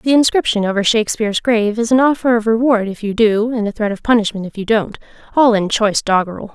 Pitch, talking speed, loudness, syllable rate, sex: 220 Hz, 230 wpm, -15 LUFS, 6.4 syllables/s, female